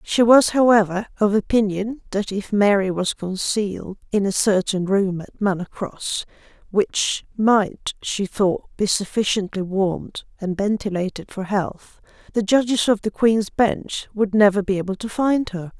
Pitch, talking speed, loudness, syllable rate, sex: 205 Hz, 155 wpm, -21 LUFS, 4.3 syllables/s, female